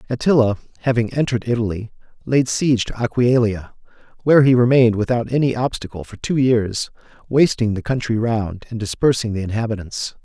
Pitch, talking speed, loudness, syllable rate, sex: 115 Hz, 145 wpm, -19 LUFS, 5.8 syllables/s, male